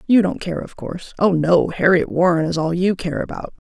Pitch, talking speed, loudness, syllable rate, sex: 170 Hz, 230 wpm, -19 LUFS, 5.5 syllables/s, female